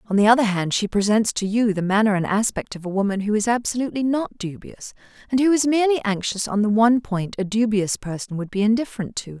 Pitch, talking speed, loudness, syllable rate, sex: 215 Hz, 230 wpm, -21 LUFS, 6.2 syllables/s, female